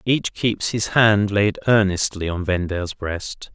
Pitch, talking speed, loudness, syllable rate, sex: 100 Hz, 150 wpm, -20 LUFS, 3.9 syllables/s, male